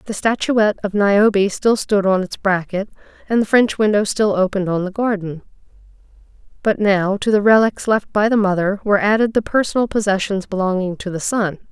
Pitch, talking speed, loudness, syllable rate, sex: 200 Hz, 185 wpm, -17 LUFS, 5.5 syllables/s, female